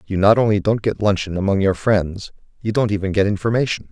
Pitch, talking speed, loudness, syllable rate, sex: 100 Hz, 215 wpm, -19 LUFS, 6.0 syllables/s, male